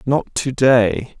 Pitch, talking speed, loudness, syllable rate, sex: 125 Hz, 150 wpm, -16 LUFS, 2.9 syllables/s, male